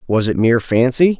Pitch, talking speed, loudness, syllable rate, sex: 125 Hz, 200 wpm, -15 LUFS, 5.8 syllables/s, male